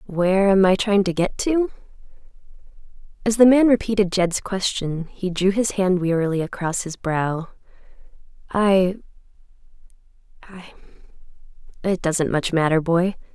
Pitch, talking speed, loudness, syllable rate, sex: 190 Hz, 115 wpm, -20 LUFS, 4.7 syllables/s, female